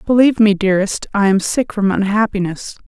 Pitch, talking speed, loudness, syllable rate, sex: 205 Hz, 165 wpm, -15 LUFS, 5.7 syllables/s, female